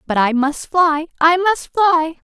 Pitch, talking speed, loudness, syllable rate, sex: 325 Hz, 180 wpm, -16 LUFS, 3.7 syllables/s, female